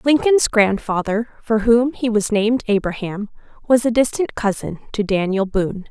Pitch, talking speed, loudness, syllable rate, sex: 220 Hz, 150 wpm, -18 LUFS, 4.7 syllables/s, female